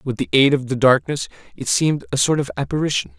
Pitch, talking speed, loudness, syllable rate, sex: 135 Hz, 225 wpm, -19 LUFS, 6.3 syllables/s, male